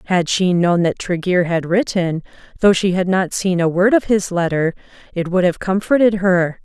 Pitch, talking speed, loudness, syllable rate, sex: 185 Hz, 200 wpm, -17 LUFS, 4.8 syllables/s, female